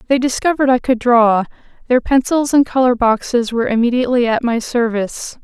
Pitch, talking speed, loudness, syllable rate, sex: 245 Hz, 165 wpm, -15 LUFS, 5.9 syllables/s, female